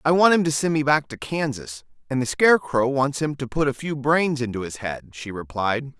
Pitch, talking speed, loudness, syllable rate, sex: 135 Hz, 240 wpm, -22 LUFS, 5.2 syllables/s, male